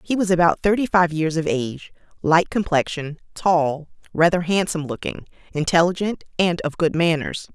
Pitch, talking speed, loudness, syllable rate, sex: 170 Hz, 135 wpm, -20 LUFS, 5.1 syllables/s, female